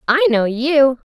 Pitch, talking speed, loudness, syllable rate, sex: 270 Hz, 155 wpm, -15 LUFS, 3.5 syllables/s, female